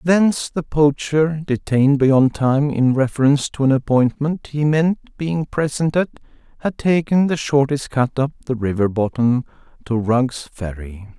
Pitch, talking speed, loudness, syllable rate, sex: 140 Hz, 150 wpm, -18 LUFS, 4.4 syllables/s, male